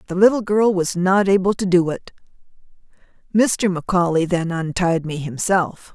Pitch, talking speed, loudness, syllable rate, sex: 180 Hz, 150 wpm, -19 LUFS, 4.8 syllables/s, female